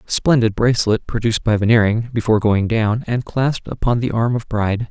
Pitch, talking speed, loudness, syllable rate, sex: 115 Hz, 185 wpm, -18 LUFS, 5.7 syllables/s, male